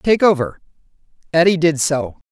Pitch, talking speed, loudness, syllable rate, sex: 170 Hz, 130 wpm, -16 LUFS, 4.9 syllables/s, female